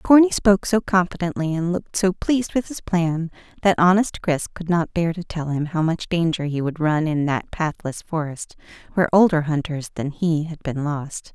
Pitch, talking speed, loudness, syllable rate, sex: 170 Hz, 200 wpm, -21 LUFS, 5.0 syllables/s, female